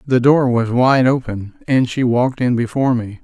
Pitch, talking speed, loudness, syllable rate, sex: 125 Hz, 205 wpm, -16 LUFS, 5.1 syllables/s, male